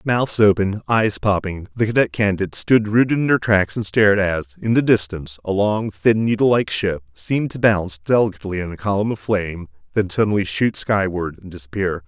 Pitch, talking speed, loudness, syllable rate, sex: 100 Hz, 190 wpm, -19 LUFS, 5.7 syllables/s, male